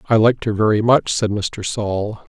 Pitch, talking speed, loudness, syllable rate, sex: 105 Hz, 205 wpm, -18 LUFS, 4.6 syllables/s, male